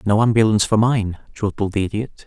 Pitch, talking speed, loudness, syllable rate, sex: 105 Hz, 185 wpm, -19 LUFS, 5.9 syllables/s, male